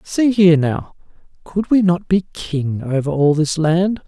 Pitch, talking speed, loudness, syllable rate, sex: 170 Hz, 175 wpm, -17 LUFS, 4.0 syllables/s, male